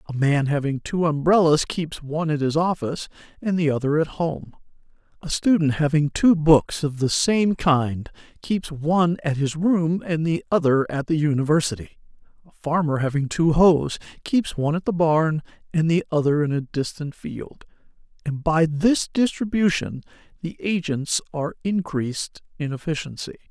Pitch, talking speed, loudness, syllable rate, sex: 160 Hz, 160 wpm, -22 LUFS, 4.9 syllables/s, male